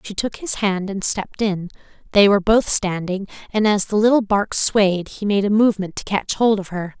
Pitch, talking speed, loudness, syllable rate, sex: 200 Hz, 225 wpm, -19 LUFS, 5.2 syllables/s, female